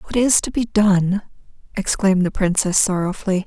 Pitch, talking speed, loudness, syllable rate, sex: 195 Hz, 155 wpm, -18 LUFS, 5.2 syllables/s, female